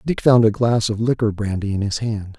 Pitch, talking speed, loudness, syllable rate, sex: 110 Hz, 250 wpm, -19 LUFS, 5.3 syllables/s, male